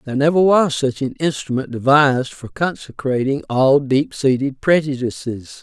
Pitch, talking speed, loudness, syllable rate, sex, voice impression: 140 Hz, 140 wpm, -18 LUFS, 4.8 syllables/s, male, masculine, middle-aged, powerful, slightly weak, slightly soft, muffled, raspy, mature, friendly, wild, slightly lively, slightly intense